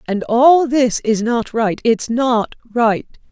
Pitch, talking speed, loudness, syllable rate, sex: 235 Hz, 165 wpm, -16 LUFS, 3.1 syllables/s, female